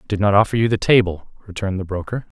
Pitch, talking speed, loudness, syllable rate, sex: 100 Hz, 250 wpm, -19 LUFS, 7.2 syllables/s, male